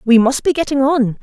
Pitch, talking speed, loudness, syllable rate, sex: 265 Hz, 245 wpm, -15 LUFS, 5.5 syllables/s, female